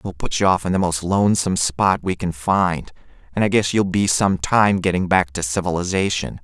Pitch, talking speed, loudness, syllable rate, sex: 90 Hz, 215 wpm, -19 LUFS, 5.3 syllables/s, male